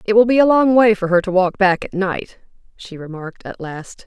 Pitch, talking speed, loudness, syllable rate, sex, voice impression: 200 Hz, 250 wpm, -15 LUFS, 5.3 syllables/s, female, very feminine, very adult-like, very middle-aged, very thin, slightly relaxed, weak, slightly bright, soft, very muffled, fluent, raspy, cute, slightly cool, very intellectual, refreshing, very sincere, very calm, very friendly, very reassuring, very unique, very elegant, slightly wild, very sweet, slightly lively, kind, modest, very light